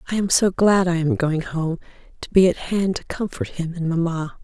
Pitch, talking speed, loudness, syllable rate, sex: 170 Hz, 230 wpm, -21 LUFS, 5.1 syllables/s, female